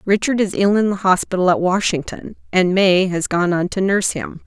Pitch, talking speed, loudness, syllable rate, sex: 190 Hz, 215 wpm, -17 LUFS, 5.3 syllables/s, female